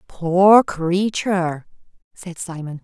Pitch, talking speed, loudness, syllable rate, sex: 180 Hz, 85 wpm, -18 LUFS, 3.2 syllables/s, female